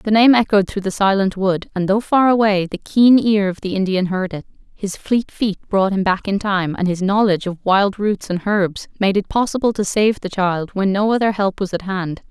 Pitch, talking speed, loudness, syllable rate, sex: 200 Hz, 240 wpm, -17 LUFS, 5.0 syllables/s, female